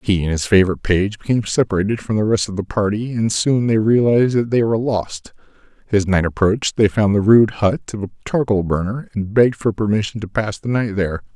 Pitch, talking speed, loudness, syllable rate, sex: 105 Hz, 220 wpm, -18 LUFS, 6.0 syllables/s, male